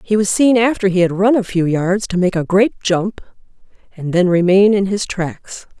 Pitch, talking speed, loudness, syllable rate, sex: 190 Hz, 215 wpm, -15 LUFS, 4.8 syllables/s, female